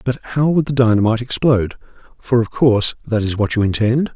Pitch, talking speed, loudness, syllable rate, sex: 120 Hz, 190 wpm, -17 LUFS, 6.0 syllables/s, male